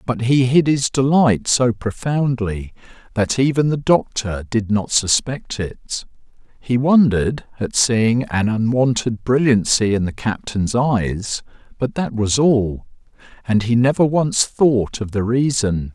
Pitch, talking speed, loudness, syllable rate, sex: 120 Hz, 145 wpm, -18 LUFS, 3.8 syllables/s, male